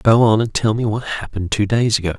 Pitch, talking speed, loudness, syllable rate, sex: 110 Hz, 300 wpm, -18 LUFS, 6.7 syllables/s, male